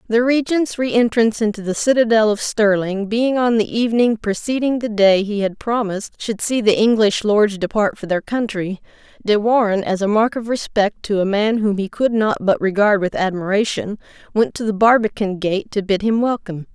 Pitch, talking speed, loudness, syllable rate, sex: 215 Hz, 195 wpm, -18 LUFS, 5.3 syllables/s, female